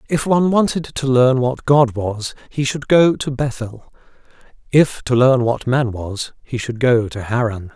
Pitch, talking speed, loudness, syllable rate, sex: 125 Hz, 185 wpm, -17 LUFS, 4.3 syllables/s, male